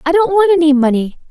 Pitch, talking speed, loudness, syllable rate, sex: 320 Hz, 230 wpm, -12 LUFS, 6.4 syllables/s, female